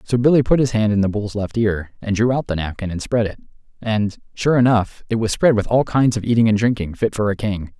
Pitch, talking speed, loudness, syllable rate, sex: 110 Hz, 270 wpm, -19 LUFS, 5.8 syllables/s, male